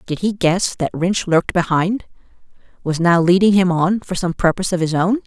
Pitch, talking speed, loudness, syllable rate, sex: 180 Hz, 205 wpm, -17 LUFS, 5.3 syllables/s, female